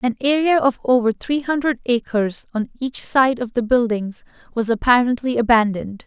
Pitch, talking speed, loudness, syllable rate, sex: 245 Hz, 160 wpm, -19 LUFS, 5.1 syllables/s, female